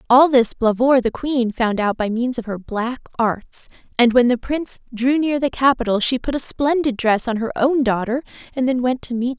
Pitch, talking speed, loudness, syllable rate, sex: 245 Hz, 235 wpm, -19 LUFS, 5.1 syllables/s, female